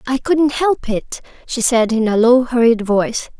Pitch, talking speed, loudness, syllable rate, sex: 245 Hz, 195 wpm, -15 LUFS, 4.4 syllables/s, female